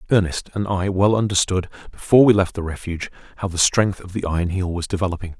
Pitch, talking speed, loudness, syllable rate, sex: 95 Hz, 210 wpm, -20 LUFS, 6.6 syllables/s, male